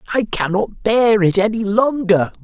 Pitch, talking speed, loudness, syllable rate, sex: 210 Hz, 150 wpm, -16 LUFS, 4.4 syllables/s, male